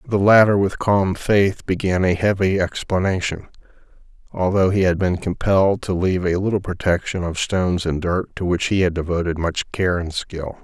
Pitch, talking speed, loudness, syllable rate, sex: 95 Hz, 180 wpm, -19 LUFS, 5.1 syllables/s, male